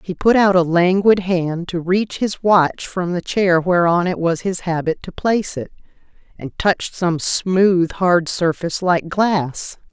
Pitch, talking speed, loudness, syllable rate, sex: 180 Hz, 175 wpm, -17 LUFS, 4.0 syllables/s, female